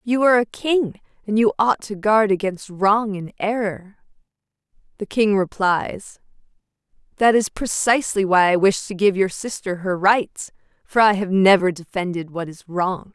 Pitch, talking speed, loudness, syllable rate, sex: 200 Hz, 165 wpm, -19 LUFS, 4.5 syllables/s, female